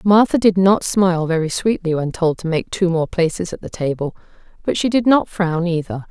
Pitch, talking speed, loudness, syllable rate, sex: 180 Hz, 215 wpm, -18 LUFS, 5.2 syllables/s, female